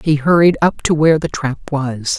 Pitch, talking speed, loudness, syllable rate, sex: 150 Hz, 220 wpm, -15 LUFS, 4.9 syllables/s, female